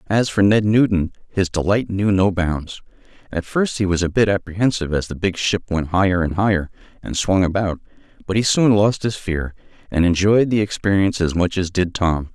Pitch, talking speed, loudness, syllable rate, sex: 95 Hz, 205 wpm, -19 LUFS, 5.4 syllables/s, male